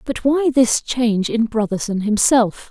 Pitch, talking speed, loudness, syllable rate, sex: 235 Hz, 155 wpm, -17 LUFS, 4.2 syllables/s, female